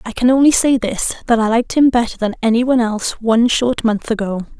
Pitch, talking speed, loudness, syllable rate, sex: 235 Hz, 235 wpm, -15 LUFS, 6.3 syllables/s, female